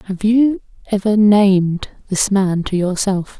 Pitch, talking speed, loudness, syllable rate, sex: 200 Hz, 140 wpm, -16 LUFS, 4.0 syllables/s, female